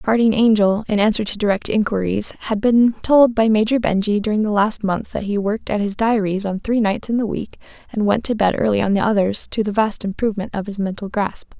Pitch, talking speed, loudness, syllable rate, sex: 210 Hz, 235 wpm, -18 LUFS, 5.7 syllables/s, female